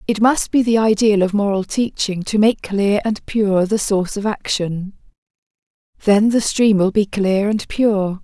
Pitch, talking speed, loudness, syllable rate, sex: 205 Hz, 180 wpm, -17 LUFS, 4.3 syllables/s, female